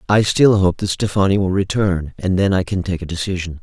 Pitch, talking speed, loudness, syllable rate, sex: 95 Hz, 230 wpm, -18 LUFS, 5.6 syllables/s, male